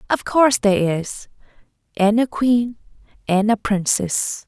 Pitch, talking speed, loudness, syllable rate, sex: 210 Hz, 135 wpm, -18 LUFS, 4.2 syllables/s, female